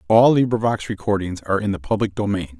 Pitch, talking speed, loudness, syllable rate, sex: 100 Hz, 185 wpm, -20 LUFS, 6.6 syllables/s, male